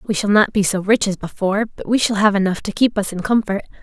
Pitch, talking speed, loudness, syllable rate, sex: 205 Hz, 285 wpm, -18 LUFS, 6.2 syllables/s, female